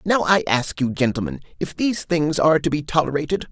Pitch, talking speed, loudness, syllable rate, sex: 150 Hz, 205 wpm, -21 LUFS, 6.0 syllables/s, male